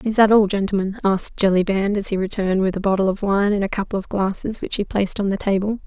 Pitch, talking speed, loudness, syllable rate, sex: 200 Hz, 255 wpm, -20 LUFS, 6.5 syllables/s, female